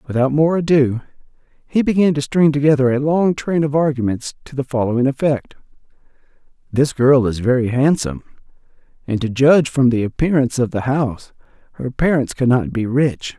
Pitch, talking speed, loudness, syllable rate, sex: 135 Hz, 155 wpm, -17 LUFS, 5.6 syllables/s, male